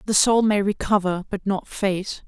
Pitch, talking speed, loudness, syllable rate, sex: 200 Hz, 185 wpm, -22 LUFS, 4.4 syllables/s, female